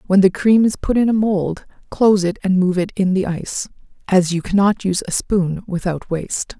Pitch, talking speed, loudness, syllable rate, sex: 190 Hz, 220 wpm, -18 LUFS, 5.3 syllables/s, female